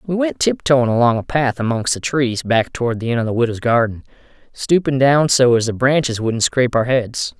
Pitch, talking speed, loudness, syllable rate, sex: 125 Hz, 220 wpm, -17 LUFS, 5.3 syllables/s, male